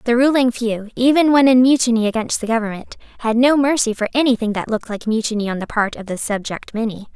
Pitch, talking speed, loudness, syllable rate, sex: 230 Hz, 225 wpm, -17 LUFS, 6.2 syllables/s, female